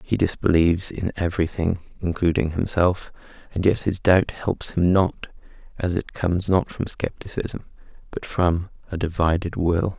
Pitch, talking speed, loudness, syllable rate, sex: 90 Hz, 145 wpm, -23 LUFS, 4.8 syllables/s, male